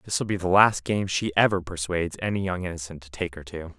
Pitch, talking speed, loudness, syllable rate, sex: 90 Hz, 255 wpm, -24 LUFS, 6.1 syllables/s, male